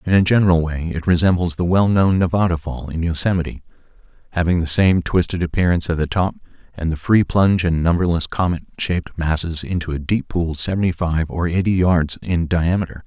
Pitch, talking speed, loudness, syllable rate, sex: 85 Hz, 185 wpm, -19 LUFS, 5.8 syllables/s, male